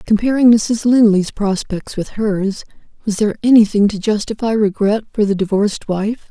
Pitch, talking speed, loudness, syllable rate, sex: 210 Hz, 150 wpm, -15 LUFS, 5.1 syllables/s, female